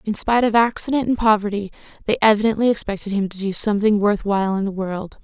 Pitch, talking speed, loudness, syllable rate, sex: 210 Hz, 205 wpm, -19 LUFS, 6.6 syllables/s, female